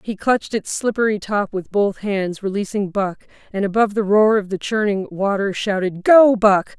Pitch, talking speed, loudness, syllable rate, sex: 205 Hz, 185 wpm, -18 LUFS, 4.9 syllables/s, female